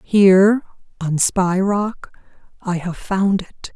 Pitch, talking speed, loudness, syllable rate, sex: 190 Hz, 130 wpm, -18 LUFS, 3.2 syllables/s, female